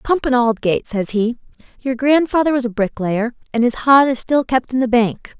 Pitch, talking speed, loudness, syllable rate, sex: 245 Hz, 210 wpm, -17 LUFS, 5.1 syllables/s, female